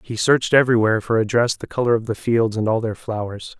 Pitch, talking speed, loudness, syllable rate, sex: 115 Hz, 250 wpm, -19 LUFS, 6.3 syllables/s, male